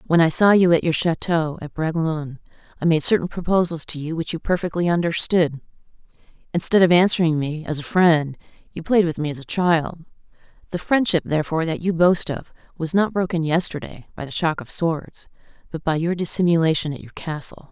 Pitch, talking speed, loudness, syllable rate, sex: 165 Hz, 190 wpm, -21 LUFS, 5.7 syllables/s, female